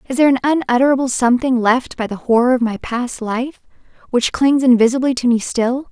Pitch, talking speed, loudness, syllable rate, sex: 250 Hz, 195 wpm, -16 LUFS, 5.8 syllables/s, female